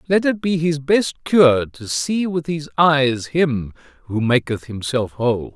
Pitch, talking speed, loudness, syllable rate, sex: 140 Hz, 175 wpm, -19 LUFS, 3.8 syllables/s, male